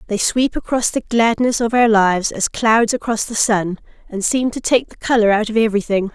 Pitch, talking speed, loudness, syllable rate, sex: 225 Hz, 215 wpm, -17 LUFS, 5.3 syllables/s, female